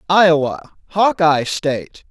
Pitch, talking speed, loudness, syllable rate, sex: 165 Hz, 85 wpm, -16 LUFS, 4.6 syllables/s, male